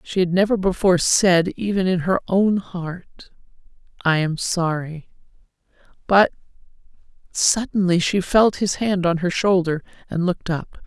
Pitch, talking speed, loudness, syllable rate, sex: 180 Hz, 135 wpm, -20 LUFS, 4.4 syllables/s, female